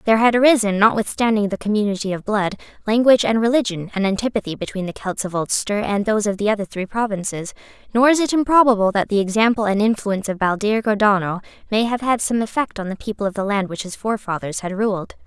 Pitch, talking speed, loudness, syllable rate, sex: 210 Hz, 210 wpm, -19 LUFS, 6.4 syllables/s, female